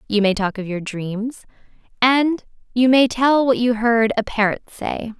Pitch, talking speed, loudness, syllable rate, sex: 230 Hz, 185 wpm, -19 LUFS, 4.2 syllables/s, female